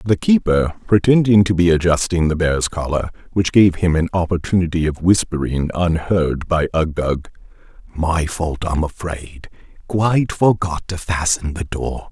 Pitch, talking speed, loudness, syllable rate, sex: 85 Hz, 145 wpm, -18 LUFS, 4.5 syllables/s, male